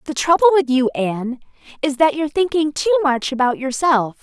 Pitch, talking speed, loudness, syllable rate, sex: 285 Hz, 185 wpm, -18 LUFS, 5.8 syllables/s, female